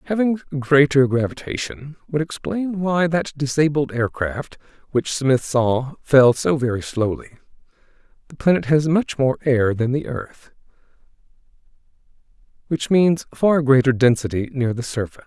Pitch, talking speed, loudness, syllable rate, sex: 140 Hz, 130 wpm, -20 LUFS, 4.6 syllables/s, male